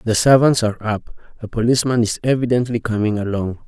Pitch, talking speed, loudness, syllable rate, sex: 115 Hz, 145 wpm, -18 LUFS, 6.3 syllables/s, male